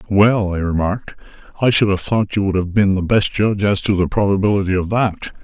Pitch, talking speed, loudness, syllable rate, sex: 100 Hz, 220 wpm, -17 LUFS, 5.7 syllables/s, male